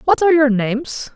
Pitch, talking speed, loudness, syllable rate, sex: 270 Hz, 210 wpm, -16 LUFS, 5.8 syllables/s, female